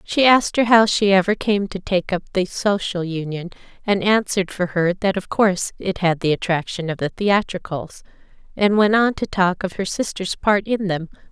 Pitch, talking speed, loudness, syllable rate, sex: 190 Hz, 200 wpm, -19 LUFS, 5.1 syllables/s, female